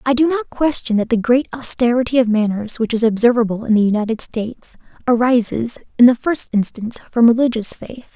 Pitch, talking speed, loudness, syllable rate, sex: 235 Hz, 185 wpm, -17 LUFS, 5.7 syllables/s, female